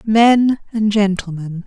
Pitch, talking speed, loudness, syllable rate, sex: 210 Hz, 110 wpm, -16 LUFS, 3.4 syllables/s, female